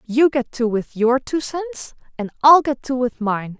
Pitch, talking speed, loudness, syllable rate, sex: 255 Hz, 215 wpm, -18 LUFS, 4.2 syllables/s, female